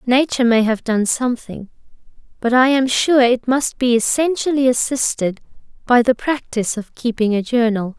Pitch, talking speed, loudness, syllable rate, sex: 245 Hz, 160 wpm, -17 LUFS, 5.1 syllables/s, female